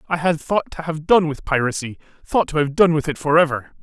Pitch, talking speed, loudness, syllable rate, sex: 155 Hz, 250 wpm, -19 LUFS, 5.9 syllables/s, male